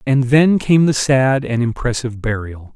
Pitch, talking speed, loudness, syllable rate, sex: 130 Hz, 175 wpm, -16 LUFS, 4.6 syllables/s, male